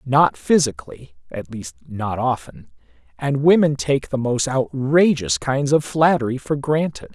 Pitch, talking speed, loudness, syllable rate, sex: 130 Hz, 125 wpm, -19 LUFS, 4.3 syllables/s, male